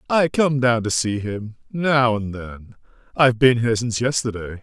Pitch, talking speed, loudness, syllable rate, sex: 120 Hz, 170 wpm, -20 LUFS, 5.1 syllables/s, male